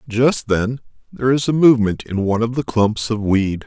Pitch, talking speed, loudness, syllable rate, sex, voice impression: 115 Hz, 215 wpm, -18 LUFS, 5.4 syllables/s, male, very masculine, very adult-like, old, very thick, slightly tensed, powerful, bright, slightly soft, slightly clear, fluent, slightly raspy, very cool, intellectual, slightly refreshing, sincere, calm, very mature, friendly, reassuring, very unique, wild, very lively, kind, slightly intense